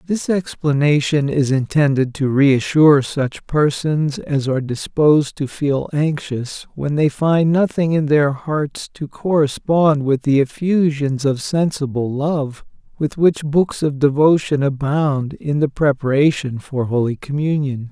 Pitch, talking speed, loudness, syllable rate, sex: 145 Hz, 135 wpm, -18 LUFS, 4.0 syllables/s, male